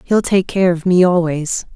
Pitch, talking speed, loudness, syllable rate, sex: 180 Hz, 205 wpm, -15 LUFS, 4.4 syllables/s, female